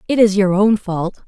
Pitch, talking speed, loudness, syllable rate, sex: 200 Hz, 235 wpm, -16 LUFS, 4.7 syllables/s, female